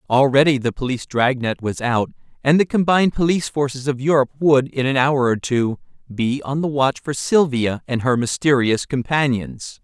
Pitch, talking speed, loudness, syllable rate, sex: 135 Hz, 185 wpm, -19 LUFS, 5.2 syllables/s, male